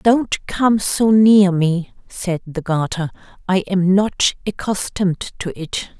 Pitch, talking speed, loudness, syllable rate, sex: 190 Hz, 140 wpm, -18 LUFS, 3.4 syllables/s, female